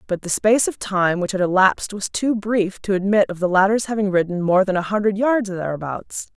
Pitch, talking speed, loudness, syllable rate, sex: 195 Hz, 235 wpm, -19 LUFS, 5.7 syllables/s, female